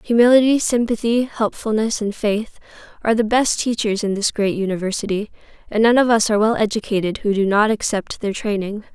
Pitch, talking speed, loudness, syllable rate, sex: 215 Hz, 175 wpm, -19 LUFS, 5.7 syllables/s, female